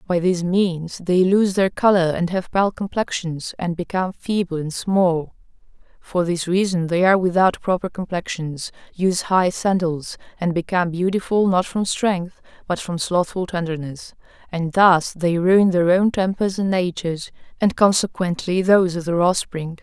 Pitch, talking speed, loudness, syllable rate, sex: 180 Hz, 155 wpm, -20 LUFS, 4.7 syllables/s, female